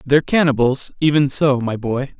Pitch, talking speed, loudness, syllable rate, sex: 135 Hz, 165 wpm, -17 LUFS, 5.1 syllables/s, male